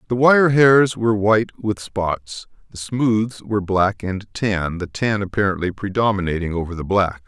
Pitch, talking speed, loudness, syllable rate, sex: 105 Hz, 165 wpm, -19 LUFS, 4.6 syllables/s, male